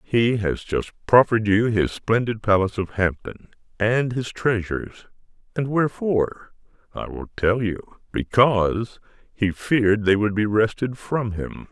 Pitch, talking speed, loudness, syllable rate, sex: 110 Hz, 140 wpm, -22 LUFS, 4.3 syllables/s, male